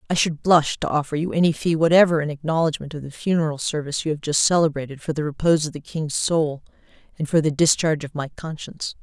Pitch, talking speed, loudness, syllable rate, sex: 155 Hz, 220 wpm, -21 LUFS, 6.4 syllables/s, female